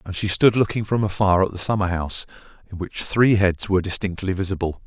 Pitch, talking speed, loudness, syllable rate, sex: 95 Hz, 210 wpm, -21 LUFS, 6.0 syllables/s, male